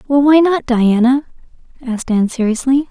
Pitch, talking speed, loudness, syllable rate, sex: 255 Hz, 145 wpm, -14 LUFS, 5.5 syllables/s, female